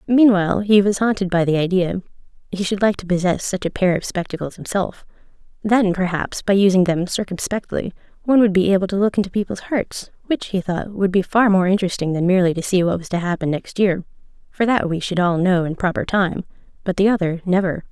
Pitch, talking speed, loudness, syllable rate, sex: 190 Hz, 210 wpm, -19 LUFS, 5.9 syllables/s, female